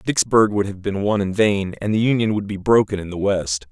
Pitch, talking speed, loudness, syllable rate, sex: 100 Hz, 260 wpm, -19 LUFS, 5.3 syllables/s, male